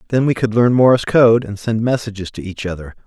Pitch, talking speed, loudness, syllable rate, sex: 110 Hz, 235 wpm, -16 LUFS, 5.9 syllables/s, male